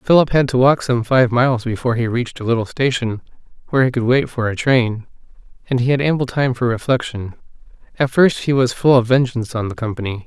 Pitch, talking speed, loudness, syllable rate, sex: 125 Hz, 215 wpm, -17 LUFS, 6.1 syllables/s, male